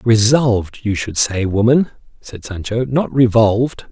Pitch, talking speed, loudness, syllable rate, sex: 115 Hz, 140 wpm, -16 LUFS, 4.3 syllables/s, male